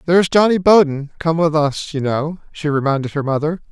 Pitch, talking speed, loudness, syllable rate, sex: 155 Hz, 195 wpm, -17 LUFS, 5.4 syllables/s, male